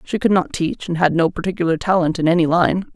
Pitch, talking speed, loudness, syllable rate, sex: 175 Hz, 245 wpm, -18 LUFS, 6.2 syllables/s, female